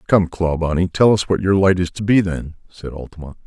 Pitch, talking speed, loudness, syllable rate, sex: 90 Hz, 225 wpm, -17 LUFS, 5.5 syllables/s, male